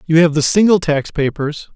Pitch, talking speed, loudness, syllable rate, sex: 160 Hz, 205 wpm, -15 LUFS, 5.0 syllables/s, male